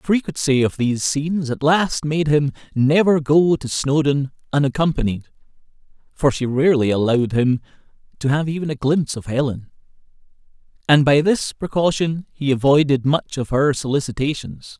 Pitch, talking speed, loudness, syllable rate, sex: 145 Hz, 145 wpm, -19 LUFS, 4.4 syllables/s, male